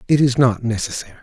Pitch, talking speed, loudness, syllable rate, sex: 125 Hz, 195 wpm, -18 LUFS, 7.2 syllables/s, male